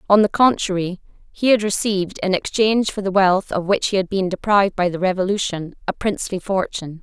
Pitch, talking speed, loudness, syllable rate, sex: 190 Hz, 195 wpm, -19 LUFS, 5.9 syllables/s, female